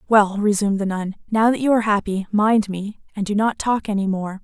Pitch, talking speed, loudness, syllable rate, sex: 205 Hz, 230 wpm, -20 LUFS, 5.6 syllables/s, female